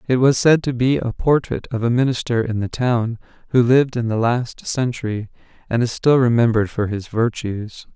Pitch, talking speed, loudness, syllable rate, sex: 120 Hz, 195 wpm, -19 LUFS, 5.1 syllables/s, male